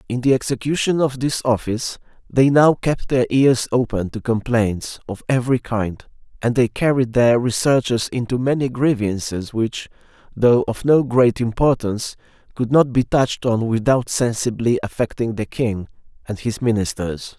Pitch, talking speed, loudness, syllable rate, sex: 120 Hz, 150 wpm, -19 LUFS, 4.7 syllables/s, male